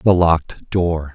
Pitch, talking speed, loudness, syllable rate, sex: 85 Hz, 155 wpm, -18 LUFS, 3.6 syllables/s, male